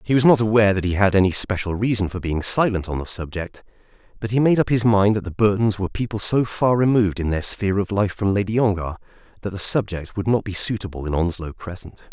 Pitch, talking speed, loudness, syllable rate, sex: 100 Hz, 240 wpm, -20 LUFS, 6.2 syllables/s, male